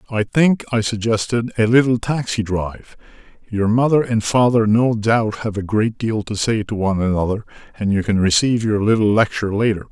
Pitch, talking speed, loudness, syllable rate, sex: 110 Hz, 180 wpm, -18 LUFS, 5.6 syllables/s, male